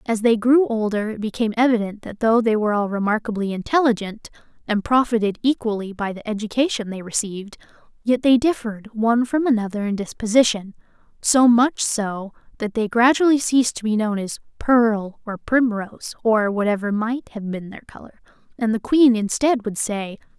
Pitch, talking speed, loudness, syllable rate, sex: 225 Hz, 170 wpm, -20 LUFS, 5.3 syllables/s, female